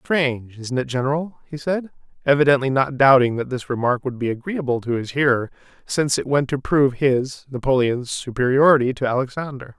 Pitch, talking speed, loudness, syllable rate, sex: 135 Hz, 170 wpm, -20 LUFS, 5.6 syllables/s, male